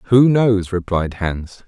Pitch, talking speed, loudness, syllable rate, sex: 100 Hz, 145 wpm, -17 LUFS, 3.1 syllables/s, male